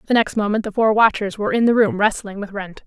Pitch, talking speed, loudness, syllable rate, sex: 210 Hz, 270 wpm, -18 LUFS, 6.3 syllables/s, female